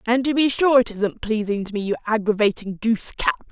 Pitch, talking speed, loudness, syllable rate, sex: 225 Hz, 220 wpm, -21 LUFS, 5.8 syllables/s, female